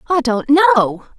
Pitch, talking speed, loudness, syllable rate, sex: 280 Hz, 150 wpm, -14 LUFS, 3.4 syllables/s, female